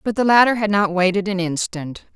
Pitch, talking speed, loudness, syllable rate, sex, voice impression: 195 Hz, 220 wpm, -18 LUFS, 5.5 syllables/s, female, very feminine, adult-like, middle-aged, thin, tensed, powerful, bright, very hard, very clear, fluent, slightly cute, cool, very intellectual, refreshing, very sincere, very calm, very friendly, very reassuring, very unique, elegant, slightly wild, slightly sweet, lively, slightly strict, slightly intense, slightly sharp